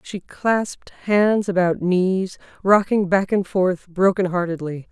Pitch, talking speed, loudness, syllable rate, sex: 190 Hz, 135 wpm, -20 LUFS, 3.9 syllables/s, female